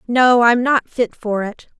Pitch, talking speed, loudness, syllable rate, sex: 235 Hz, 200 wpm, -16 LUFS, 3.8 syllables/s, female